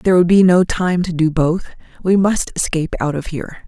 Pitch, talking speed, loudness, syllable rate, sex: 175 Hz, 230 wpm, -16 LUFS, 5.9 syllables/s, female